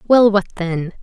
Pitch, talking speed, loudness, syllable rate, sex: 195 Hz, 175 wpm, -16 LUFS, 4.4 syllables/s, female